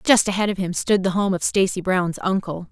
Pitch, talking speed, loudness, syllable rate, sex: 190 Hz, 245 wpm, -21 LUFS, 5.4 syllables/s, female